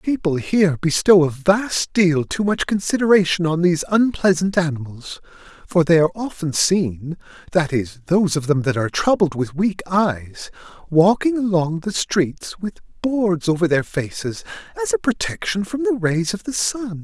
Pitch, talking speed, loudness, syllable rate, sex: 175 Hz, 160 wpm, -19 LUFS, 4.7 syllables/s, male